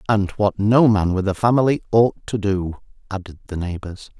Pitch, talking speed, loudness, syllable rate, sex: 100 Hz, 185 wpm, -19 LUFS, 4.9 syllables/s, male